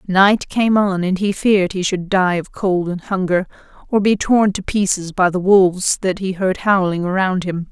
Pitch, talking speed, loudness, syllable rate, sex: 190 Hz, 210 wpm, -17 LUFS, 4.5 syllables/s, female